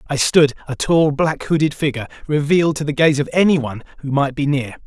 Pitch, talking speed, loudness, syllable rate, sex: 145 Hz, 195 wpm, -17 LUFS, 5.8 syllables/s, male